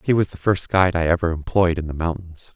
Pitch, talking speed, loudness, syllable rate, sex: 85 Hz, 260 wpm, -20 LUFS, 6.1 syllables/s, male